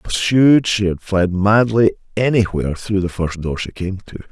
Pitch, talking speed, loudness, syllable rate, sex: 100 Hz, 165 wpm, -17 LUFS, 4.7 syllables/s, male